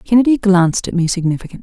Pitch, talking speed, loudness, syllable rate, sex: 190 Hz, 185 wpm, -15 LUFS, 7.6 syllables/s, female